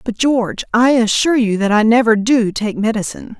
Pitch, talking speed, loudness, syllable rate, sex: 225 Hz, 195 wpm, -15 LUFS, 5.6 syllables/s, female